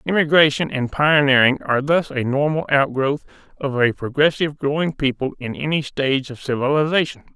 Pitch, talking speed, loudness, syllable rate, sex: 140 Hz, 145 wpm, -19 LUFS, 5.4 syllables/s, male